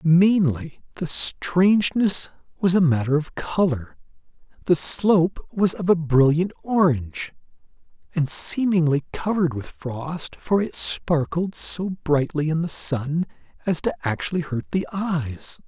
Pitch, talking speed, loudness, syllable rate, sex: 165 Hz, 130 wpm, -22 LUFS, 4.0 syllables/s, male